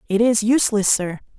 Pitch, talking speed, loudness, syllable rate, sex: 215 Hz, 175 wpm, -18 LUFS, 5.8 syllables/s, female